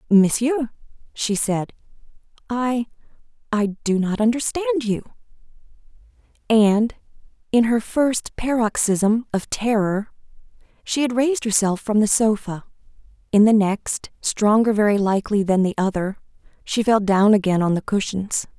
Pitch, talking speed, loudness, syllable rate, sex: 215 Hz, 125 wpm, -20 LUFS, 4.4 syllables/s, female